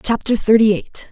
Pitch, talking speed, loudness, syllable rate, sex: 215 Hz, 160 wpm, -15 LUFS, 5.0 syllables/s, female